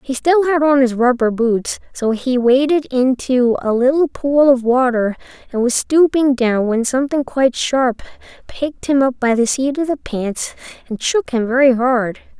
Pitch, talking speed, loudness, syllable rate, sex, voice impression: 260 Hz, 185 wpm, -16 LUFS, 4.5 syllables/s, female, slightly gender-neutral, slightly young, tensed, slightly bright, clear, cute, friendly